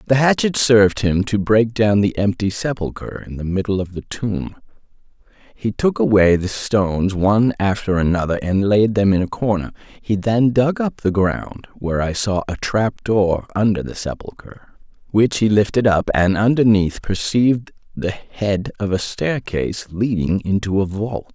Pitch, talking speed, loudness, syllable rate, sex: 105 Hz, 170 wpm, -18 LUFS, 4.6 syllables/s, male